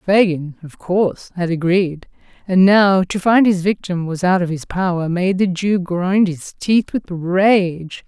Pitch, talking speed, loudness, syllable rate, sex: 180 Hz, 180 wpm, -17 LUFS, 3.9 syllables/s, female